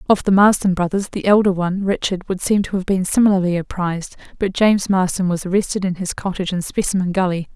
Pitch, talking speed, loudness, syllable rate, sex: 190 Hz, 205 wpm, -18 LUFS, 6.3 syllables/s, female